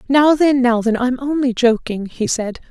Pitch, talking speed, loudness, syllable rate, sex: 250 Hz, 200 wpm, -16 LUFS, 4.5 syllables/s, female